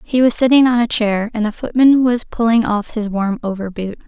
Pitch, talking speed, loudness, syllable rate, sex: 225 Hz, 235 wpm, -15 LUFS, 5.2 syllables/s, female